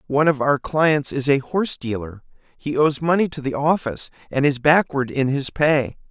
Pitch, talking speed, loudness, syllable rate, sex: 140 Hz, 185 wpm, -20 LUFS, 5.2 syllables/s, male